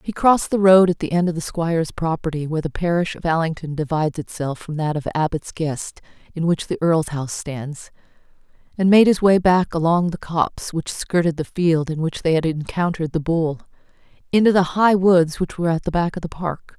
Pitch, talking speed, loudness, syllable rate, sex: 165 Hz, 215 wpm, -20 LUFS, 5.5 syllables/s, female